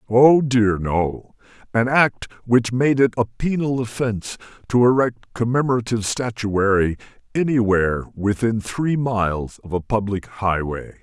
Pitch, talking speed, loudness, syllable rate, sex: 115 Hz, 125 wpm, -20 LUFS, 4.5 syllables/s, male